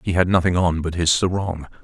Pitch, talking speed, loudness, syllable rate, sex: 90 Hz, 230 wpm, -20 LUFS, 5.6 syllables/s, male